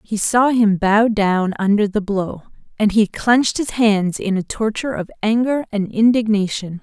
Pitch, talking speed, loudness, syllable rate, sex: 210 Hz, 175 wpm, -17 LUFS, 4.7 syllables/s, female